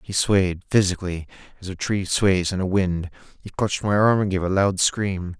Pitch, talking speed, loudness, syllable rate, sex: 95 Hz, 210 wpm, -22 LUFS, 5.1 syllables/s, male